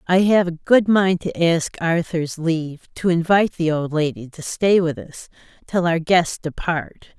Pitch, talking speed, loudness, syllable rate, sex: 170 Hz, 185 wpm, -19 LUFS, 4.5 syllables/s, female